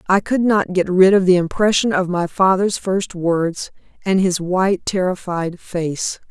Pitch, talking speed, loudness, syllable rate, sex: 185 Hz, 170 wpm, -17 LUFS, 4.2 syllables/s, female